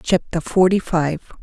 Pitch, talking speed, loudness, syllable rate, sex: 175 Hz, 125 wpm, -19 LUFS, 4.4 syllables/s, female